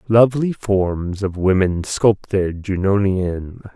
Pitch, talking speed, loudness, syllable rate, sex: 100 Hz, 95 wpm, -18 LUFS, 3.5 syllables/s, male